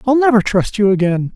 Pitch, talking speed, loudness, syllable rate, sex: 215 Hz, 220 wpm, -14 LUFS, 5.7 syllables/s, male